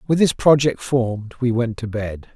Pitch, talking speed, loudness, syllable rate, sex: 120 Hz, 205 wpm, -19 LUFS, 4.7 syllables/s, male